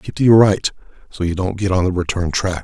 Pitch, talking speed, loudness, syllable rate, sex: 95 Hz, 275 wpm, -17 LUFS, 5.8 syllables/s, male